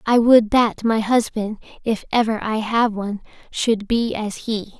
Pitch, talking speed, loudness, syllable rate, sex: 220 Hz, 175 wpm, -20 LUFS, 4.4 syllables/s, female